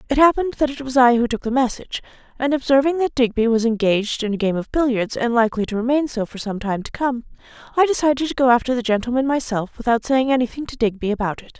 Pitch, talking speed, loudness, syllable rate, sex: 245 Hz, 240 wpm, -20 LUFS, 6.7 syllables/s, female